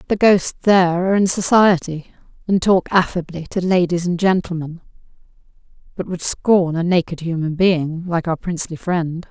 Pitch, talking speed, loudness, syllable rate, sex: 175 Hz, 150 wpm, -18 LUFS, 4.9 syllables/s, female